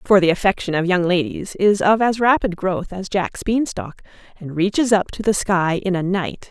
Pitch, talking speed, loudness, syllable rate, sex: 190 Hz, 220 wpm, -19 LUFS, 4.9 syllables/s, female